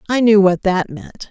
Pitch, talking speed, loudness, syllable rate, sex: 190 Hz, 230 wpm, -14 LUFS, 4.4 syllables/s, female